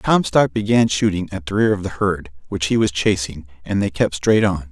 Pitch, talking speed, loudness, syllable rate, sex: 95 Hz, 230 wpm, -19 LUFS, 5.1 syllables/s, male